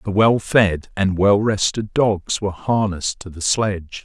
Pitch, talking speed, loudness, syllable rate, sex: 100 Hz, 180 wpm, -19 LUFS, 4.4 syllables/s, male